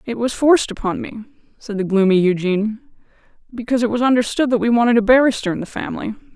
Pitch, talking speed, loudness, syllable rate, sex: 230 Hz, 200 wpm, -17 LUFS, 7.1 syllables/s, female